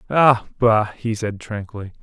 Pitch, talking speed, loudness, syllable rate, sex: 110 Hz, 150 wpm, -20 LUFS, 4.6 syllables/s, male